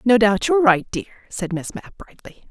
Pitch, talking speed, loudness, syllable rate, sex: 215 Hz, 215 wpm, -19 LUFS, 5.1 syllables/s, female